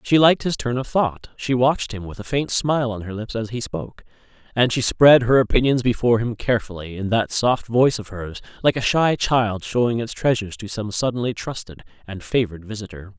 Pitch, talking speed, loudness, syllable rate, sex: 115 Hz, 215 wpm, -21 LUFS, 5.8 syllables/s, male